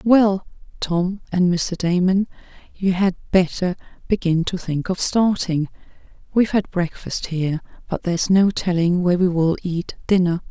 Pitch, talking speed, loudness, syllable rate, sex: 180 Hz, 150 wpm, -20 LUFS, 4.7 syllables/s, female